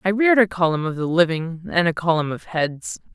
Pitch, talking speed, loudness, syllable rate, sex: 175 Hz, 230 wpm, -20 LUFS, 5.7 syllables/s, female